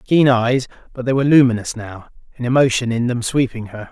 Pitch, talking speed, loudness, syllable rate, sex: 125 Hz, 185 wpm, -17 LUFS, 5.9 syllables/s, male